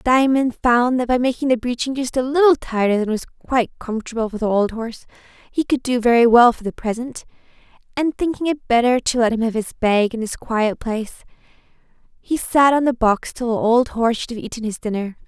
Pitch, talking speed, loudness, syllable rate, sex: 240 Hz, 215 wpm, -19 LUFS, 5.8 syllables/s, female